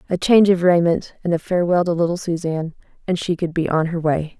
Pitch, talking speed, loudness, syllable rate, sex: 170 Hz, 230 wpm, -19 LUFS, 6.3 syllables/s, female